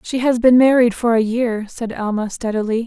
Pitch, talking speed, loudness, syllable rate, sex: 230 Hz, 210 wpm, -17 LUFS, 5.2 syllables/s, female